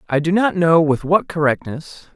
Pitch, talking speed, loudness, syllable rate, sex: 165 Hz, 195 wpm, -17 LUFS, 4.7 syllables/s, male